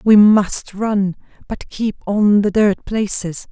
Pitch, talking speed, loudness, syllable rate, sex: 205 Hz, 155 wpm, -16 LUFS, 3.4 syllables/s, female